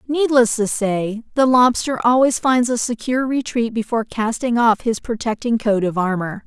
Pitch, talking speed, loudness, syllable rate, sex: 230 Hz, 165 wpm, -18 LUFS, 4.9 syllables/s, female